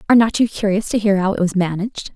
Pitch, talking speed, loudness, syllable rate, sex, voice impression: 200 Hz, 280 wpm, -18 LUFS, 7.1 syllables/s, female, feminine, adult-like, clear, very fluent, slightly sincere, friendly, slightly reassuring, slightly elegant